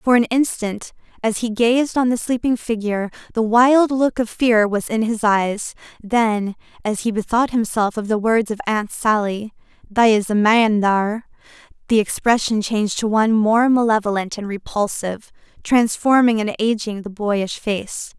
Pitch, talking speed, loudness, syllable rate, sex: 220 Hz, 165 wpm, -18 LUFS, 4.4 syllables/s, female